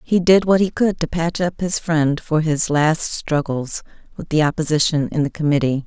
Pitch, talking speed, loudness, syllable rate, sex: 160 Hz, 205 wpm, -18 LUFS, 4.8 syllables/s, female